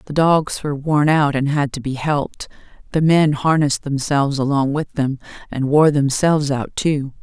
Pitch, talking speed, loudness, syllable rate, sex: 145 Hz, 185 wpm, -18 LUFS, 5.0 syllables/s, female